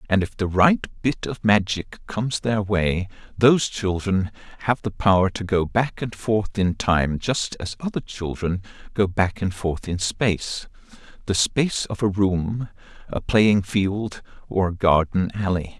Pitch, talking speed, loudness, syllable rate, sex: 100 Hz, 165 wpm, -22 LUFS, 4.1 syllables/s, male